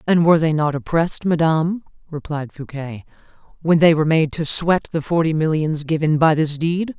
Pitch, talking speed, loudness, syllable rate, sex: 160 Hz, 180 wpm, -18 LUFS, 5.4 syllables/s, female